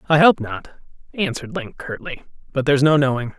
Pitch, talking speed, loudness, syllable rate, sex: 155 Hz, 175 wpm, -20 LUFS, 6.0 syllables/s, female